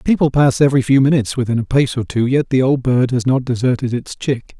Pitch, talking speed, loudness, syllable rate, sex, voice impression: 130 Hz, 250 wpm, -16 LUFS, 5.9 syllables/s, male, masculine, middle-aged, powerful, hard, slightly halting, raspy, cool, mature, slightly friendly, wild, lively, strict, intense